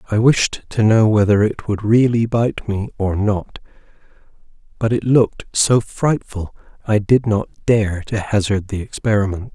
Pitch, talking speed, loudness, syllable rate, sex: 105 Hz, 155 wpm, -17 LUFS, 4.4 syllables/s, male